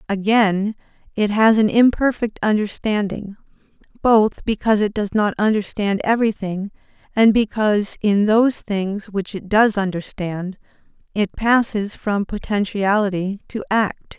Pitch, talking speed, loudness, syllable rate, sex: 205 Hz, 120 wpm, -19 LUFS, 4.4 syllables/s, female